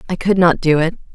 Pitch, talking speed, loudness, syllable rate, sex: 170 Hz, 260 wpm, -15 LUFS, 6.1 syllables/s, female